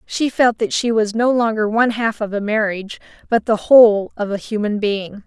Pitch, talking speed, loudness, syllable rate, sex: 220 Hz, 215 wpm, -17 LUFS, 5.2 syllables/s, female